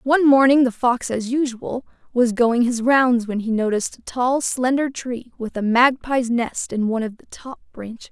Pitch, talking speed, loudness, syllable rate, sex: 245 Hz, 200 wpm, -20 LUFS, 4.8 syllables/s, female